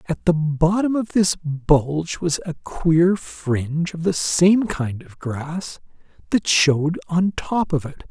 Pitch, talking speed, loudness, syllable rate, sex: 165 Hz, 165 wpm, -20 LUFS, 3.6 syllables/s, male